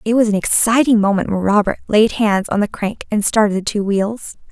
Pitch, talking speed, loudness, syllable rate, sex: 210 Hz, 225 wpm, -16 LUFS, 5.3 syllables/s, female